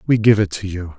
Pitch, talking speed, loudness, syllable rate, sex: 100 Hz, 305 wpm, -18 LUFS, 5.9 syllables/s, male